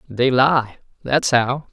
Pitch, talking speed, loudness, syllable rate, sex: 130 Hz, 140 wpm, -18 LUFS, 3.2 syllables/s, male